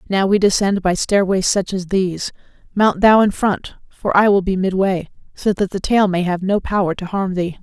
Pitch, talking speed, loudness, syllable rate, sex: 190 Hz, 220 wpm, -17 LUFS, 5.0 syllables/s, female